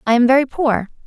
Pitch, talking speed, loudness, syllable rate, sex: 255 Hz, 225 wpm, -16 LUFS, 6.2 syllables/s, female